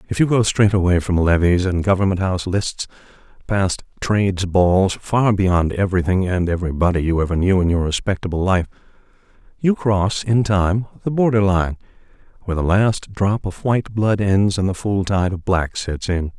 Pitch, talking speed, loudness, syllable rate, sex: 95 Hz, 170 wpm, -18 LUFS, 5.0 syllables/s, male